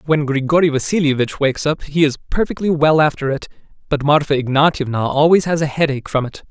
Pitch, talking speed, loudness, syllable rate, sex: 145 Hz, 195 wpm, -17 LUFS, 6.5 syllables/s, male